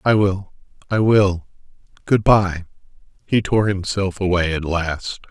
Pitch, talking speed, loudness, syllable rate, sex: 95 Hz, 135 wpm, -19 LUFS, 3.9 syllables/s, male